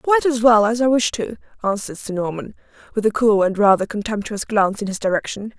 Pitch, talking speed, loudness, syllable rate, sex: 215 Hz, 215 wpm, -19 LUFS, 6.1 syllables/s, female